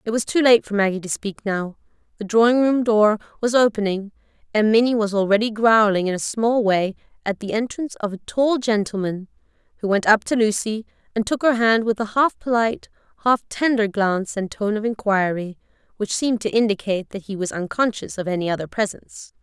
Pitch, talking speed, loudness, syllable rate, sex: 215 Hz, 190 wpm, -20 LUFS, 5.6 syllables/s, female